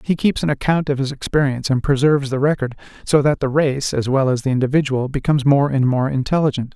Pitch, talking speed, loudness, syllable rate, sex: 140 Hz, 220 wpm, -18 LUFS, 6.3 syllables/s, male